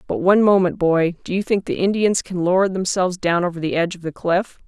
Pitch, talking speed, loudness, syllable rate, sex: 180 Hz, 245 wpm, -19 LUFS, 6.2 syllables/s, female